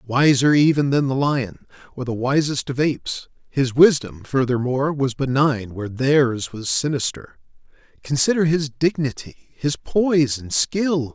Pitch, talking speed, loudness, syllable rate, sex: 135 Hz, 140 wpm, -20 LUFS, 4.3 syllables/s, male